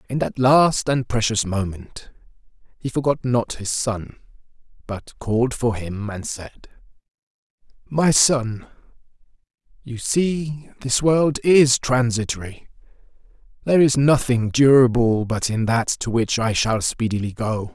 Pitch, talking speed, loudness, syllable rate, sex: 120 Hz, 130 wpm, -20 LUFS, 4.0 syllables/s, male